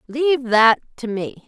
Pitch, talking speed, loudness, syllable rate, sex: 245 Hz, 165 wpm, -18 LUFS, 4.7 syllables/s, female